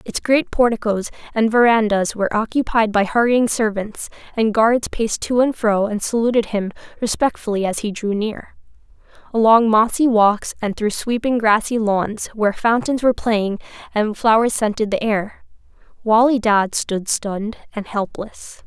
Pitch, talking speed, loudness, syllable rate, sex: 220 Hz, 150 wpm, -18 LUFS, 4.7 syllables/s, female